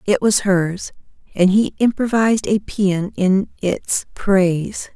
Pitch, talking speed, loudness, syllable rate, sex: 195 Hz, 135 wpm, -18 LUFS, 3.6 syllables/s, female